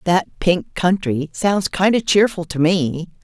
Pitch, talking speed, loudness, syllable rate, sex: 180 Hz, 165 wpm, -18 LUFS, 3.9 syllables/s, female